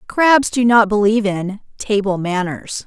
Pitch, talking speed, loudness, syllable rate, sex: 210 Hz, 145 wpm, -16 LUFS, 4.4 syllables/s, female